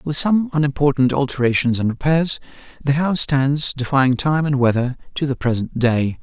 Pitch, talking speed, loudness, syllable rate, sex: 140 Hz, 165 wpm, -18 LUFS, 5.1 syllables/s, male